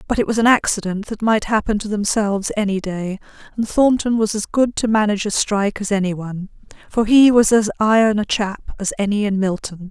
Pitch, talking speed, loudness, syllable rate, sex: 210 Hz, 210 wpm, -18 LUFS, 5.7 syllables/s, female